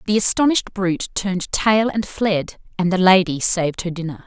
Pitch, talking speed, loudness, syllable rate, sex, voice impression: 190 Hz, 185 wpm, -18 LUFS, 5.4 syllables/s, female, very feminine, slightly young, slightly adult-like, very thin, very tensed, powerful, very bright, hard, very clear, very fluent, cool, slightly intellectual, very refreshing, sincere, slightly calm, very friendly, slightly reassuring, very wild, slightly sweet, very lively, strict, intense, sharp